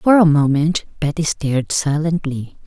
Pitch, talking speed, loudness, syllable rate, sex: 155 Hz, 135 wpm, -17 LUFS, 4.6 syllables/s, female